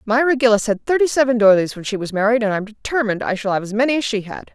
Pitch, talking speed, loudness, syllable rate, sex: 225 Hz, 275 wpm, -18 LUFS, 7.0 syllables/s, female